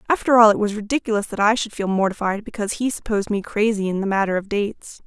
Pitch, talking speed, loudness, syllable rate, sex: 210 Hz, 235 wpm, -20 LUFS, 6.8 syllables/s, female